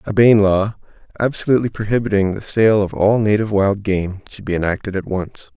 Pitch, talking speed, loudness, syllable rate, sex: 105 Hz, 185 wpm, -17 LUFS, 5.9 syllables/s, male